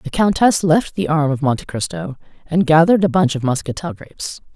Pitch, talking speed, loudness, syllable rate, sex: 165 Hz, 200 wpm, -17 LUFS, 5.6 syllables/s, female